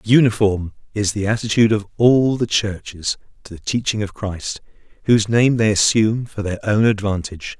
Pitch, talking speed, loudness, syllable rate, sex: 105 Hz, 165 wpm, -18 LUFS, 5.3 syllables/s, male